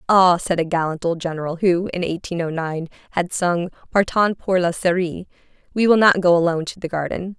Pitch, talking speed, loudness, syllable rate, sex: 175 Hz, 195 wpm, -20 LUFS, 5.5 syllables/s, female